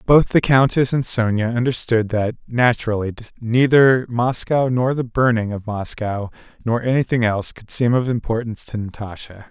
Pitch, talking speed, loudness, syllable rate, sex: 120 Hz, 150 wpm, -19 LUFS, 5.0 syllables/s, male